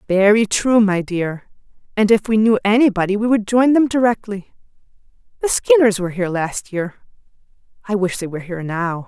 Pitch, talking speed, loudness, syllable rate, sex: 205 Hz, 165 wpm, -17 LUFS, 5.5 syllables/s, female